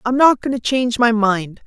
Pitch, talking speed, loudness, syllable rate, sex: 235 Hz, 255 wpm, -16 LUFS, 5.2 syllables/s, female